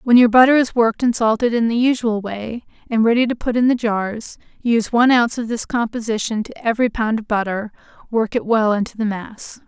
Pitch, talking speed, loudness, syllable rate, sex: 230 Hz, 215 wpm, -18 LUFS, 5.7 syllables/s, female